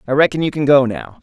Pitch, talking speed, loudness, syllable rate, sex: 135 Hz, 295 wpm, -15 LUFS, 6.5 syllables/s, male